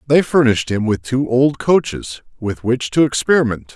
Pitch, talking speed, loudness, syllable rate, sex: 125 Hz, 175 wpm, -16 LUFS, 5.0 syllables/s, male